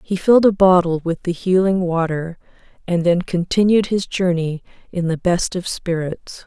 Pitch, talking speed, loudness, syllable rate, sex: 175 Hz, 165 wpm, -18 LUFS, 4.6 syllables/s, female